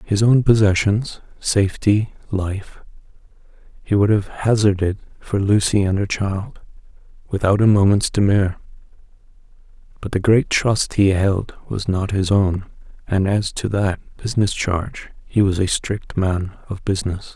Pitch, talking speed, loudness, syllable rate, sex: 100 Hz, 140 wpm, -19 LUFS, 4.4 syllables/s, male